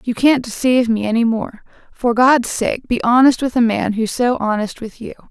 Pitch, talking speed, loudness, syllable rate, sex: 235 Hz, 215 wpm, -16 LUFS, 5.1 syllables/s, female